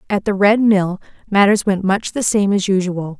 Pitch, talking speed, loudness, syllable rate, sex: 195 Hz, 205 wpm, -16 LUFS, 4.8 syllables/s, female